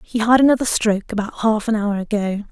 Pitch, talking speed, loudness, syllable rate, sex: 215 Hz, 215 wpm, -18 LUFS, 6.0 syllables/s, female